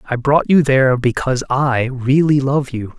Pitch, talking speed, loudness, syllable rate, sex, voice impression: 135 Hz, 180 wpm, -15 LUFS, 5.0 syllables/s, male, adult-like, tensed, powerful, slightly hard, clear, cool, slightly friendly, unique, wild, lively, slightly strict, slightly intense